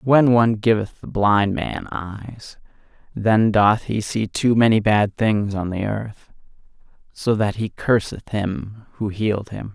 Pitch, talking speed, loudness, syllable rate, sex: 105 Hz, 165 wpm, -20 LUFS, 3.9 syllables/s, male